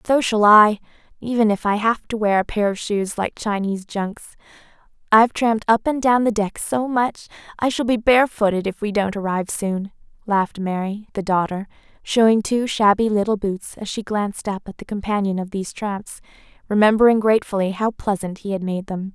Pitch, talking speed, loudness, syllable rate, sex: 210 Hz, 190 wpm, -20 LUFS, 5.4 syllables/s, female